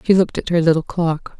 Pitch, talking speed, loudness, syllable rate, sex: 170 Hz, 260 wpm, -18 LUFS, 6.2 syllables/s, female